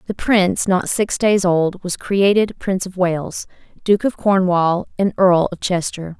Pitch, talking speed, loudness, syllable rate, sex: 185 Hz, 175 wpm, -17 LUFS, 4.2 syllables/s, female